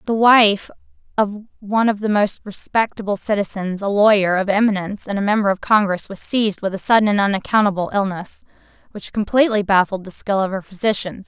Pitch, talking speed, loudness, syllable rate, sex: 205 Hz, 170 wpm, -18 LUFS, 5.9 syllables/s, female